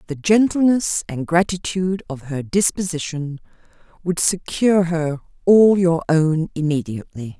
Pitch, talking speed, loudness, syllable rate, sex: 170 Hz, 115 wpm, -19 LUFS, 4.6 syllables/s, female